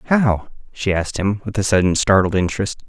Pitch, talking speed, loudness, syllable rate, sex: 100 Hz, 190 wpm, -18 LUFS, 5.5 syllables/s, male